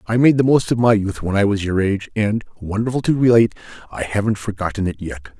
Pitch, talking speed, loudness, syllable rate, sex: 105 Hz, 235 wpm, -18 LUFS, 6.2 syllables/s, male